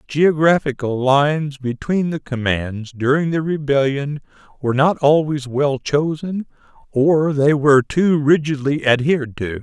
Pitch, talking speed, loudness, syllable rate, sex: 145 Hz, 125 wpm, -18 LUFS, 4.3 syllables/s, male